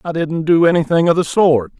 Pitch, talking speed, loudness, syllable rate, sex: 160 Hz, 235 wpm, -14 LUFS, 5.5 syllables/s, male